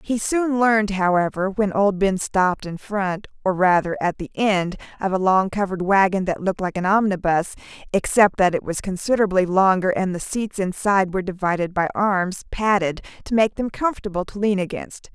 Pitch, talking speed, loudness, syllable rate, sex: 195 Hz, 180 wpm, -21 LUFS, 5.4 syllables/s, female